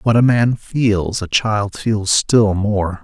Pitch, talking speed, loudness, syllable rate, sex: 105 Hz, 180 wpm, -16 LUFS, 3.1 syllables/s, male